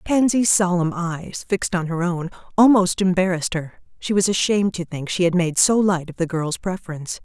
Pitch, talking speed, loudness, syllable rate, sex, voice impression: 180 Hz, 200 wpm, -20 LUFS, 5.5 syllables/s, female, very feminine, adult-like, fluent, slightly intellectual